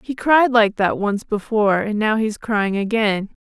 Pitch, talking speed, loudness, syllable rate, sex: 215 Hz, 190 wpm, -18 LUFS, 4.3 syllables/s, female